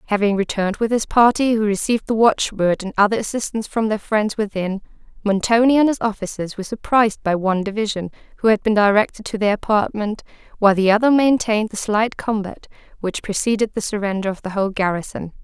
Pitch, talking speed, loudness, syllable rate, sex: 210 Hz, 185 wpm, -19 LUFS, 6.2 syllables/s, female